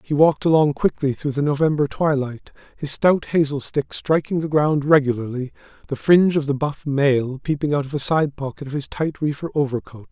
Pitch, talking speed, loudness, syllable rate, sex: 140 Hz, 195 wpm, -20 LUFS, 5.4 syllables/s, male